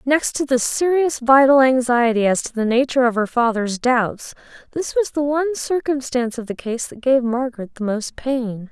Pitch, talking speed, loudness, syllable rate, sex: 255 Hz, 195 wpm, -19 LUFS, 5.0 syllables/s, female